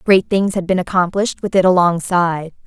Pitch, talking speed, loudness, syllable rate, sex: 180 Hz, 180 wpm, -16 LUFS, 5.7 syllables/s, female